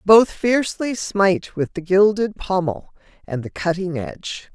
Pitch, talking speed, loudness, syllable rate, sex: 190 Hz, 145 wpm, -20 LUFS, 4.4 syllables/s, female